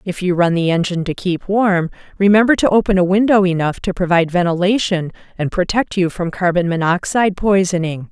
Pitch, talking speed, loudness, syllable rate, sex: 185 Hz, 180 wpm, -16 LUFS, 5.7 syllables/s, female